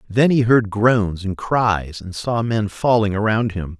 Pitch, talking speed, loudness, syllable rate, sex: 105 Hz, 190 wpm, -18 LUFS, 3.9 syllables/s, male